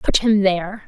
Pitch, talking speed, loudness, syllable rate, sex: 195 Hz, 205 wpm, -18 LUFS, 5.3 syllables/s, female